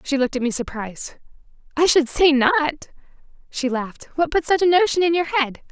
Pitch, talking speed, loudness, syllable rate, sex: 295 Hz, 190 wpm, -19 LUFS, 5.7 syllables/s, female